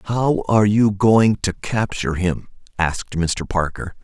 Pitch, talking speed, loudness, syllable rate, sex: 100 Hz, 150 wpm, -19 LUFS, 4.4 syllables/s, male